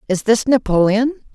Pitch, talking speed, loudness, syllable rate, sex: 225 Hz, 135 wpm, -16 LUFS, 5.1 syllables/s, female